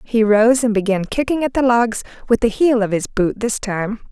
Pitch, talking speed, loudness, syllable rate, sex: 225 Hz, 235 wpm, -17 LUFS, 5.0 syllables/s, female